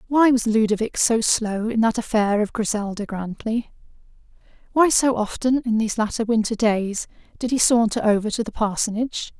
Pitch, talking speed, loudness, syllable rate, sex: 225 Hz, 165 wpm, -21 LUFS, 5.3 syllables/s, female